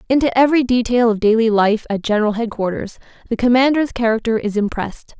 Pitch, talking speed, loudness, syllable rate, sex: 230 Hz, 160 wpm, -17 LUFS, 6.2 syllables/s, female